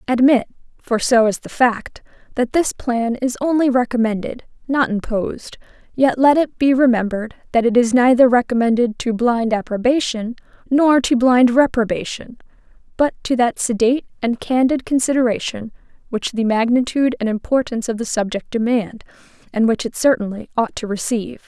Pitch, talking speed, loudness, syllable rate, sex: 240 Hz, 150 wpm, -18 LUFS, 5.2 syllables/s, female